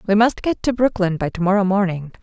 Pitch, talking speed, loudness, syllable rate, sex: 200 Hz, 215 wpm, -19 LUFS, 6.0 syllables/s, female